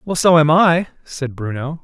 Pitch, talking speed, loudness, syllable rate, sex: 155 Hz, 195 wpm, -15 LUFS, 4.4 syllables/s, male